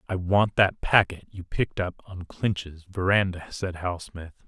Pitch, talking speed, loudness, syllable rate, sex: 95 Hz, 175 wpm, -25 LUFS, 4.3 syllables/s, male